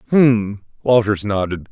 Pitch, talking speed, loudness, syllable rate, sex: 110 Hz, 105 wpm, -17 LUFS, 4.1 syllables/s, male